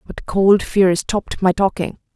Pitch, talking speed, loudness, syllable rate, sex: 190 Hz, 165 wpm, -17 LUFS, 4.3 syllables/s, female